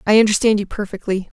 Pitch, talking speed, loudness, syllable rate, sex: 205 Hz, 170 wpm, -18 LUFS, 6.7 syllables/s, female